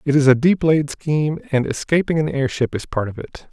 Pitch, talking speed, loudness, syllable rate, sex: 145 Hz, 255 wpm, -19 LUFS, 5.8 syllables/s, male